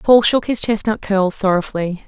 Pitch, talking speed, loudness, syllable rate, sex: 205 Hz, 175 wpm, -17 LUFS, 5.1 syllables/s, female